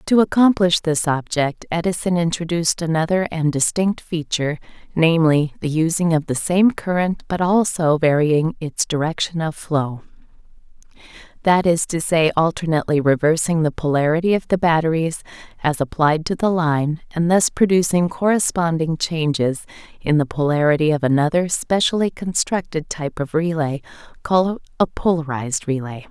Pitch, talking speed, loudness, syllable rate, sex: 165 Hz, 135 wpm, -19 LUFS, 5.1 syllables/s, female